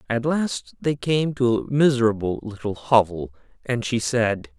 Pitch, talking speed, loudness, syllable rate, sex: 120 Hz, 155 wpm, -22 LUFS, 4.2 syllables/s, male